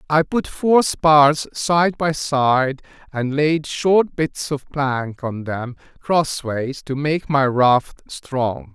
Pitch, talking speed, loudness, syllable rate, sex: 140 Hz, 150 wpm, -19 LUFS, 2.8 syllables/s, male